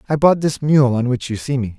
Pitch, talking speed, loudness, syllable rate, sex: 135 Hz, 300 wpm, -17 LUFS, 5.6 syllables/s, male